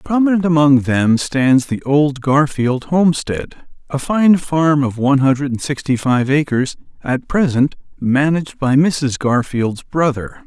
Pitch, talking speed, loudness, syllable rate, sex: 140 Hz, 145 wpm, -16 LUFS, 4.2 syllables/s, male